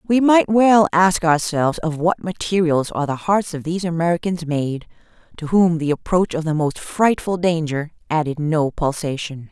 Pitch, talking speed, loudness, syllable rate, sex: 165 Hz, 170 wpm, -19 LUFS, 4.9 syllables/s, female